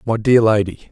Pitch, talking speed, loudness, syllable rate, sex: 110 Hz, 195 wpm, -15 LUFS, 6.0 syllables/s, male